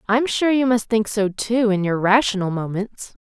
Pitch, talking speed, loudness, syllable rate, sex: 215 Hz, 205 wpm, -19 LUFS, 4.6 syllables/s, female